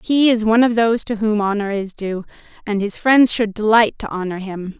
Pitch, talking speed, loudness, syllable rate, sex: 215 Hz, 225 wpm, -17 LUFS, 5.4 syllables/s, female